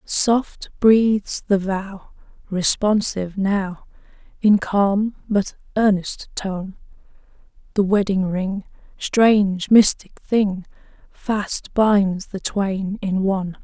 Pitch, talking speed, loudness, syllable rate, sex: 200 Hz, 100 wpm, -20 LUFS, 3.1 syllables/s, female